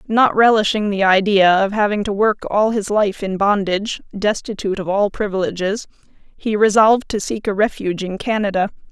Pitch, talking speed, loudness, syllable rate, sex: 205 Hz, 170 wpm, -17 LUFS, 5.3 syllables/s, female